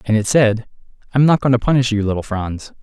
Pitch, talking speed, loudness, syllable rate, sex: 115 Hz, 235 wpm, -17 LUFS, 5.9 syllables/s, male